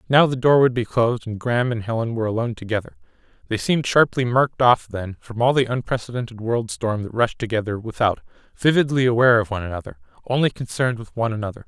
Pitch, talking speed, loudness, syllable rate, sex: 115 Hz, 200 wpm, -21 LUFS, 6.8 syllables/s, male